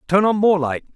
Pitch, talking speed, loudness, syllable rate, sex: 180 Hz, 255 wpm, -18 LUFS, 5.6 syllables/s, male